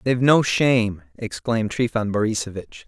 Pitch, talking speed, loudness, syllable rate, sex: 115 Hz, 125 wpm, -21 LUFS, 5.3 syllables/s, male